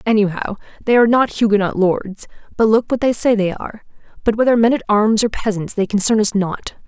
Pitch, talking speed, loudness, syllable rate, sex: 215 Hz, 210 wpm, -16 LUFS, 5.9 syllables/s, female